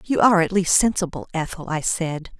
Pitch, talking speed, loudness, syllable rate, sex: 175 Hz, 200 wpm, -21 LUFS, 5.5 syllables/s, female